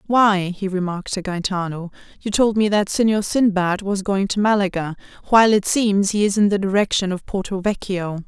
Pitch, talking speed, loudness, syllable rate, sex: 195 Hz, 190 wpm, -19 LUFS, 5.3 syllables/s, female